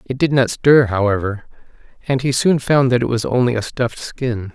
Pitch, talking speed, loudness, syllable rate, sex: 125 Hz, 210 wpm, -17 LUFS, 5.2 syllables/s, male